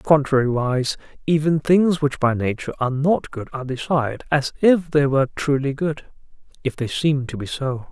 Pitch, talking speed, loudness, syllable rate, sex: 140 Hz, 175 wpm, -21 LUFS, 5.3 syllables/s, male